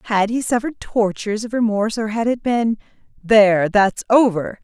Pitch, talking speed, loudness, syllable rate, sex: 220 Hz, 170 wpm, -18 LUFS, 5.4 syllables/s, female